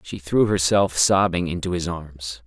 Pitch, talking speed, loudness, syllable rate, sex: 85 Hz, 170 wpm, -21 LUFS, 4.2 syllables/s, male